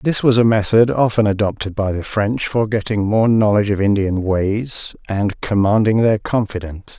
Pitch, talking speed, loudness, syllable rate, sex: 105 Hz, 170 wpm, -17 LUFS, 4.8 syllables/s, male